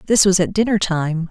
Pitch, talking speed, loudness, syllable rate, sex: 185 Hz, 230 wpm, -17 LUFS, 5.3 syllables/s, female